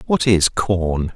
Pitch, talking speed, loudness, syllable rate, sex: 100 Hz, 155 wpm, -18 LUFS, 3.0 syllables/s, male